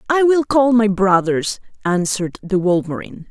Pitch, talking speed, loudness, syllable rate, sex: 205 Hz, 145 wpm, -17 LUFS, 5.0 syllables/s, female